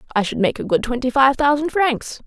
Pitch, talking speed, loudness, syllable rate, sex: 265 Hz, 240 wpm, -18 LUFS, 5.8 syllables/s, female